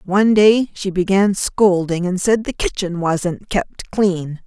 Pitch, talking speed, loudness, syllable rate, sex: 190 Hz, 160 wpm, -17 LUFS, 3.7 syllables/s, female